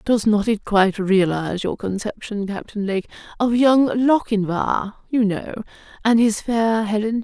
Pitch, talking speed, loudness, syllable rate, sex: 215 Hz, 150 wpm, -20 LUFS, 4.3 syllables/s, female